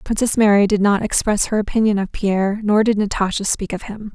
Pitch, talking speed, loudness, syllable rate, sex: 205 Hz, 215 wpm, -18 LUFS, 5.7 syllables/s, female